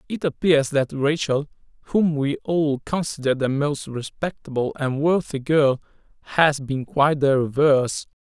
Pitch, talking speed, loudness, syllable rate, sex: 145 Hz, 140 wpm, -22 LUFS, 4.6 syllables/s, male